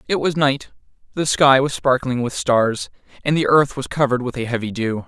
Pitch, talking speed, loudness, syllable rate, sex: 135 Hz, 215 wpm, -19 LUFS, 5.3 syllables/s, male